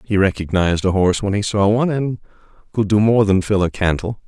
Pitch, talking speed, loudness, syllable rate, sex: 100 Hz, 225 wpm, -17 LUFS, 6.1 syllables/s, male